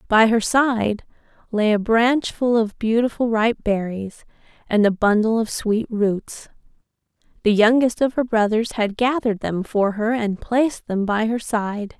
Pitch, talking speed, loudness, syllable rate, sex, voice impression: 220 Hz, 165 wpm, -20 LUFS, 4.2 syllables/s, female, very feminine, slightly young, very adult-like, thin, tensed, slightly weak, bright, slightly hard, clear, slightly fluent, slightly raspy, cute, slightly cool, intellectual, slightly refreshing, very sincere, very calm, friendly, reassuring, unique, elegant, sweet, lively, kind, slightly sharp, slightly modest, light